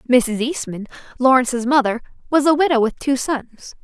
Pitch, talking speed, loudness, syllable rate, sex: 255 Hz, 155 wpm, -18 LUFS, 5.0 syllables/s, female